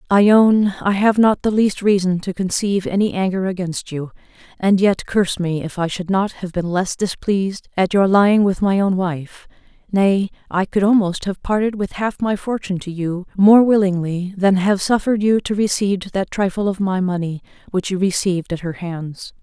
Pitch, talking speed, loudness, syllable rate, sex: 190 Hz, 200 wpm, -18 LUFS, 5.0 syllables/s, female